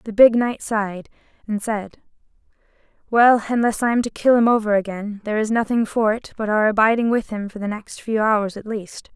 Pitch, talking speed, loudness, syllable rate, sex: 220 Hz, 210 wpm, -20 LUFS, 5.4 syllables/s, female